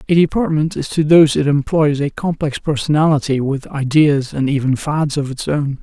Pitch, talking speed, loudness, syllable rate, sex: 145 Hz, 185 wpm, -16 LUFS, 5.2 syllables/s, male